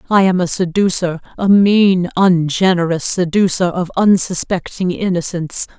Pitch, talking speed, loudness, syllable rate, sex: 180 Hz, 115 wpm, -15 LUFS, 4.6 syllables/s, female